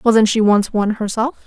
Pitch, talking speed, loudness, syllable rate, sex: 220 Hz, 205 wpm, -16 LUFS, 5.0 syllables/s, female